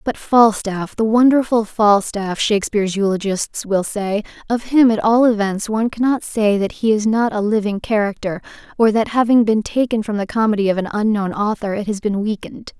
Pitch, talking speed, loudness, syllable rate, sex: 215 Hz, 190 wpm, -17 LUFS, 5.3 syllables/s, female